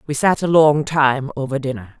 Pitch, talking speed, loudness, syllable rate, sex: 140 Hz, 210 wpm, -17 LUFS, 5.0 syllables/s, female